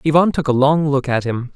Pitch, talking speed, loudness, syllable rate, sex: 140 Hz, 270 wpm, -17 LUFS, 5.7 syllables/s, male